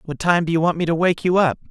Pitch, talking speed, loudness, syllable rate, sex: 170 Hz, 315 wpm, -19 LUFS, 5.7 syllables/s, male